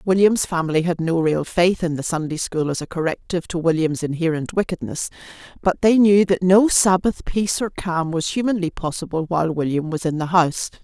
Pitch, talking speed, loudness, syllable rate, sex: 170 Hz, 195 wpm, -20 LUFS, 5.6 syllables/s, female